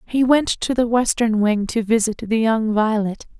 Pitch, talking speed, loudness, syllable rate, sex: 225 Hz, 195 wpm, -19 LUFS, 4.5 syllables/s, female